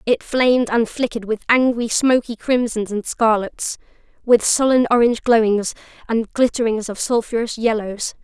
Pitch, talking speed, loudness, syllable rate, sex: 230 Hz, 140 wpm, -18 LUFS, 4.9 syllables/s, female